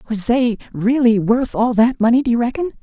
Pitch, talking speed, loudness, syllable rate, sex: 235 Hz, 210 wpm, -16 LUFS, 5.5 syllables/s, male